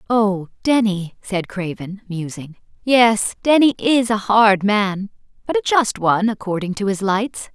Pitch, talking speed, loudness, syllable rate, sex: 210 Hz, 150 wpm, -18 LUFS, 4.1 syllables/s, female